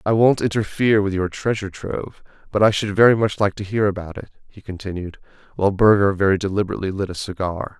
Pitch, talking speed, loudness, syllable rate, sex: 100 Hz, 200 wpm, -20 LUFS, 6.6 syllables/s, male